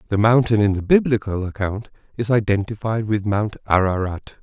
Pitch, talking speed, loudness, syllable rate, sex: 105 Hz, 150 wpm, -20 LUFS, 5.2 syllables/s, male